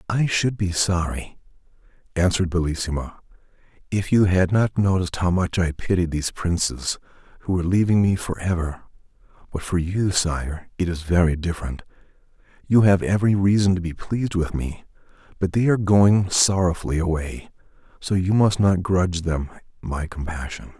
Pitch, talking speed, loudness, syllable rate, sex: 90 Hz, 155 wpm, -22 LUFS, 5.3 syllables/s, male